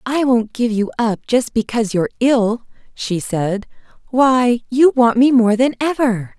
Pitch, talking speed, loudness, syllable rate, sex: 235 Hz, 170 wpm, -16 LUFS, 4.3 syllables/s, female